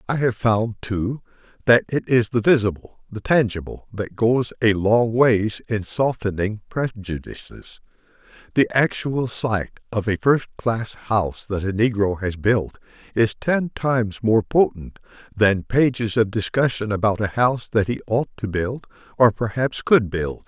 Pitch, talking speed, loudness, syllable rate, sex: 110 Hz, 150 wpm, -21 LUFS, 4.4 syllables/s, male